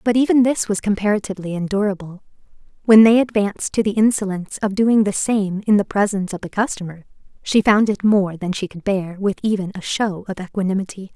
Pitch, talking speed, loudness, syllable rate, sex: 200 Hz, 195 wpm, -19 LUFS, 6.0 syllables/s, female